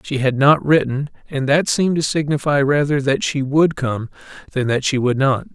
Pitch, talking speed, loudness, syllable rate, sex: 140 Hz, 205 wpm, -18 LUFS, 5.1 syllables/s, male